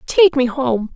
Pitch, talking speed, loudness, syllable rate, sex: 270 Hz, 190 wpm, -16 LUFS, 3.6 syllables/s, female